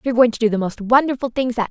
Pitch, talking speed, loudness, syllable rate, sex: 235 Hz, 315 wpm, -18 LUFS, 7.5 syllables/s, female